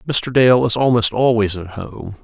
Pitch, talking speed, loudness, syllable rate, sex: 115 Hz, 190 wpm, -15 LUFS, 4.4 syllables/s, male